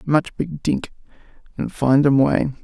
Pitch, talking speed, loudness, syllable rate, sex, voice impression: 140 Hz, 160 wpm, -19 LUFS, 4.0 syllables/s, male, masculine, very adult-like, slightly thick, slightly dark, slightly muffled, very calm, slightly reassuring, kind